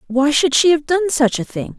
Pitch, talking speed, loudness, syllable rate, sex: 295 Hz, 270 wpm, -16 LUFS, 5.0 syllables/s, female